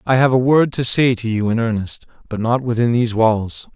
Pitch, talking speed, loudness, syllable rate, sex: 115 Hz, 240 wpm, -17 LUFS, 5.3 syllables/s, male